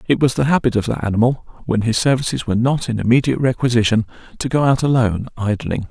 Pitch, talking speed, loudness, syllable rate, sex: 120 Hz, 205 wpm, -18 LUFS, 6.8 syllables/s, male